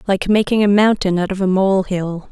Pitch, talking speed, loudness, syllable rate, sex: 190 Hz, 235 wpm, -16 LUFS, 5.1 syllables/s, female